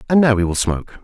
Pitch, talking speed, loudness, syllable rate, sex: 110 Hz, 290 wpm, -17 LUFS, 7.1 syllables/s, male